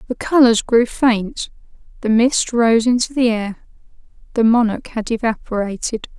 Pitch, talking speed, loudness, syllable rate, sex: 230 Hz, 135 wpm, -17 LUFS, 4.4 syllables/s, female